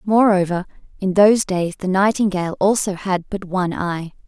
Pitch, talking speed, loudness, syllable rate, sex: 190 Hz, 155 wpm, -19 LUFS, 5.2 syllables/s, female